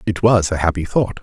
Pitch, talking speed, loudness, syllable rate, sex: 95 Hz, 245 wpm, -17 LUFS, 5.6 syllables/s, male